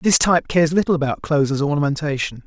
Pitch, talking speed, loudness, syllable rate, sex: 150 Hz, 195 wpm, -18 LUFS, 7.0 syllables/s, male